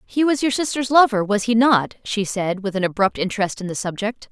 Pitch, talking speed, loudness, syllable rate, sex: 220 Hz, 235 wpm, -20 LUFS, 5.6 syllables/s, female